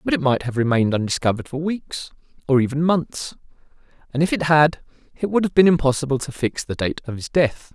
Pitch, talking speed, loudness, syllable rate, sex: 140 Hz, 210 wpm, -20 LUFS, 6.0 syllables/s, male